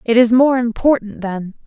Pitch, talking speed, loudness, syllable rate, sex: 230 Hz, 180 wpm, -15 LUFS, 4.8 syllables/s, female